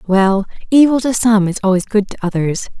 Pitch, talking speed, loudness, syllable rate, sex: 210 Hz, 195 wpm, -15 LUFS, 5.2 syllables/s, female